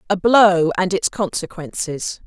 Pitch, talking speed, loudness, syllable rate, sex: 185 Hz, 130 wpm, -18 LUFS, 3.9 syllables/s, female